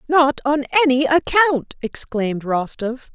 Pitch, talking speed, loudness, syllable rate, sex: 270 Hz, 115 wpm, -19 LUFS, 4.1 syllables/s, female